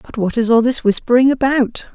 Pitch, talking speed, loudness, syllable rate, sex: 240 Hz, 215 wpm, -15 LUFS, 5.6 syllables/s, female